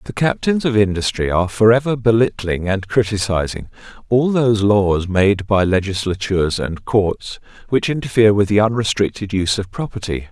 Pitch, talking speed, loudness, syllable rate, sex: 105 Hz, 145 wpm, -17 LUFS, 5.3 syllables/s, male